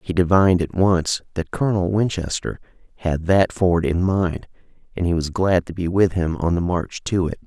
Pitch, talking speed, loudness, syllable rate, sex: 90 Hz, 200 wpm, -20 LUFS, 4.9 syllables/s, male